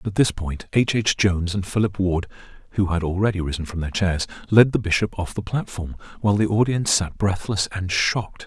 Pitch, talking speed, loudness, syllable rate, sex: 95 Hz, 215 wpm, -22 LUFS, 5.7 syllables/s, male